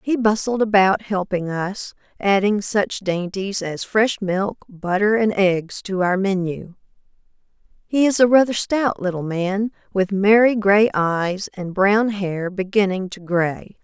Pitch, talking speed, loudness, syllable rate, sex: 200 Hz, 145 wpm, -19 LUFS, 3.8 syllables/s, female